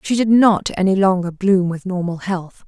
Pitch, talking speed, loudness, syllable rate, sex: 190 Hz, 200 wpm, -17 LUFS, 4.7 syllables/s, female